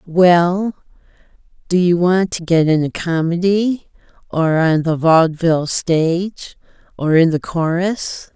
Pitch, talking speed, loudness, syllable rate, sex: 170 Hz, 130 wpm, -16 LUFS, 3.9 syllables/s, female